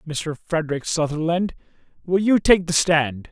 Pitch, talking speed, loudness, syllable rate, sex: 165 Hz, 145 wpm, -21 LUFS, 4.5 syllables/s, male